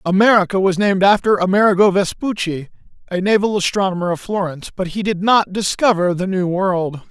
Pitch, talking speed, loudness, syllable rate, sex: 190 Hz, 160 wpm, -17 LUFS, 5.7 syllables/s, male